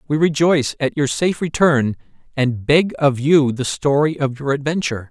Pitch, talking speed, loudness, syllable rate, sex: 145 Hz, 175 wpm, -18 LUFS, 5.1 syllables/s, male